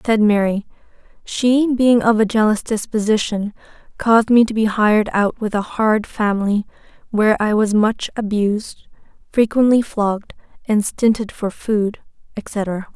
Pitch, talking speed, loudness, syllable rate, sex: 215 Hz, 140 wpm, -17 LUFS, 4.6 syllables/s, female